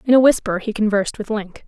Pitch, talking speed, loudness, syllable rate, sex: 215 Hz, 250 wpm, -19 LUFS, 6.4 syllables/s, female